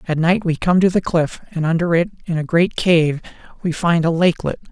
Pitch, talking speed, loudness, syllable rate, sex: 170 Hz, 230 wpm, -18 LUFS, 5.4 syllables/s, male